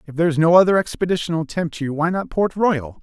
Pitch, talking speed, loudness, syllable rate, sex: 165 Hz, 220 wpm, -19 LUFS, 5.5 syllables/s, male